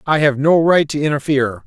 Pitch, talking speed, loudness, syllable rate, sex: 145 Hz, 215 wpm, -15 LUFS, 5.8 syllables/s, male